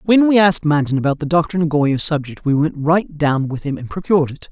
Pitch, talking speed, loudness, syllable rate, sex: 155 Hz, 240 wpm, -17 LUFS, 5.8 syllables/s, female